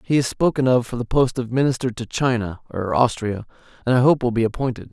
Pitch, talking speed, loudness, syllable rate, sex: 125 Hz, 230 wpm, -21 LUFS, 6.0 syllables/s, male